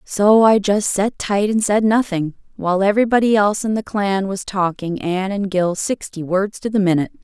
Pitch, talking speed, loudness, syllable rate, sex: 200 Hz, 200 wpm, -18 LUFS, 5.3 syllables/s, female